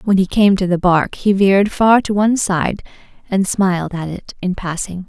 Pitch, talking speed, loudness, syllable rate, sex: 190 Hz, 215 wpm, -16 LUFS, 5.0 syllables/s, female